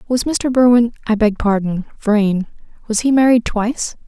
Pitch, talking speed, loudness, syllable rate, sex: 225 Hz, 135 wpm, -16 LUFS, 4.7 syllables/s, female